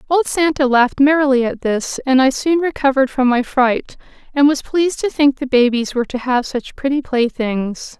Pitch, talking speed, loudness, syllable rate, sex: 265 Hz, 195 wpm, -16 LUFS, 5.2 syllables/s, female